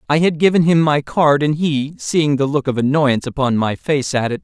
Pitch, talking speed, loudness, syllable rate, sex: 145 Hz, 230 wpm, -16 LUFS, 5.2 syllables/s, male